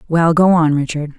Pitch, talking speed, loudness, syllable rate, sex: 160 Hz, 205 wpm, -14 LUFS, 5.2 syllables/s, female